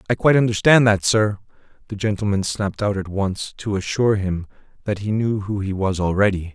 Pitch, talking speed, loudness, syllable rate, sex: 100 Hz, 190 wpm, -20 LUFS, 5.7 syllables/s, male